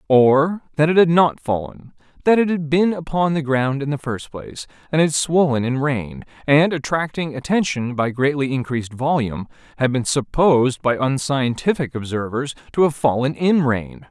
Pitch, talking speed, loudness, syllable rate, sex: 140 Hz, 170 wpm, -19 LUFS, 4.9 syllables/s, male